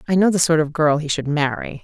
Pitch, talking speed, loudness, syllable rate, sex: 155 Hz, 295 wpm, -18 LUFS, 6.1 syllables/s, female